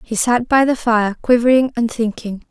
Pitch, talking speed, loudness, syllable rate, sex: 235 Hz, 190 wpm, -16 LUFS, 4.7 syllables/s, female